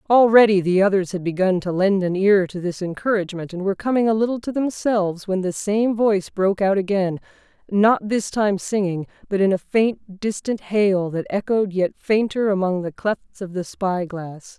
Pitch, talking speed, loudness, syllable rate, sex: 195 Hz, 190 wpm, -20 LUFS, 5.0 syllables/s, female